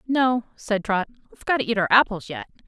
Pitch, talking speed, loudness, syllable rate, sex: 220 Hz, 225 wpm, -22 LUFS, 6.1 syllables/s, female